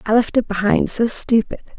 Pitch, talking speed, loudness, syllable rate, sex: 220 Hz, 200 wpm, -18 LUFS, 5.2 syllables/s, female